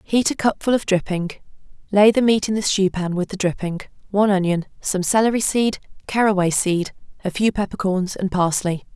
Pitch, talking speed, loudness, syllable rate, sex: 195 Hz, 180 wpm, -20 LUFS, 5.5 syllables/s, female